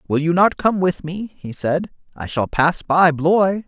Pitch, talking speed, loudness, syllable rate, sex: 170 Hz, 210 wpm, -18 LUFS, 4.1 syllables/s, male